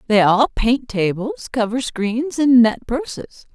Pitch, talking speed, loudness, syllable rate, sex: 245 Hz, 150 wpm, -18 LUFS, 3.7 syllables/s, female